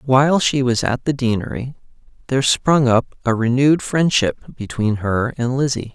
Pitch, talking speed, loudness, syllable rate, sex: 125 Hz, 160 wpm, -18 LUFS, 4.8 syllables/s, male